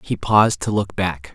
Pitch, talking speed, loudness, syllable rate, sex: 100 Hz, 225 wpm, -19 LUFS, 4.8 syllables/s, male